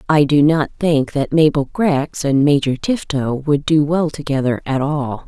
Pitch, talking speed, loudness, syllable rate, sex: 145 Hz, 180 wpm, -17 LUFS, 4.3 syllables/s, female